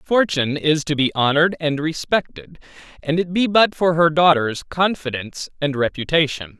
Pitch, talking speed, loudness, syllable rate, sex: 155 Hz, 155 wpm, -19 LUFS, 5.1 syllables/s, male